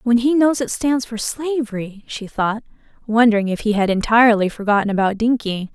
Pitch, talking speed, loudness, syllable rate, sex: 225 Hz, 175 wpm, -18 LUFS, 5.4 syllables/s, female